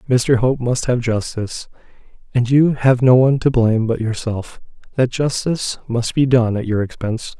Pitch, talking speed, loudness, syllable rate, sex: 120 Hz, 180 wpm, -17 LUFS, 5.1 syllables/s, male